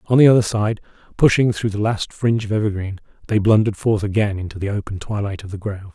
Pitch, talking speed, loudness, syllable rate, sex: 105 Hz, 220 wpm, -19 LUFS, 6.7 syllables/s, male